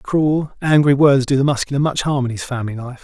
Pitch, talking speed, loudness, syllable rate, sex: 135 Hz, 235 wpm, -17 LUFS, 5.9 syllables/s, male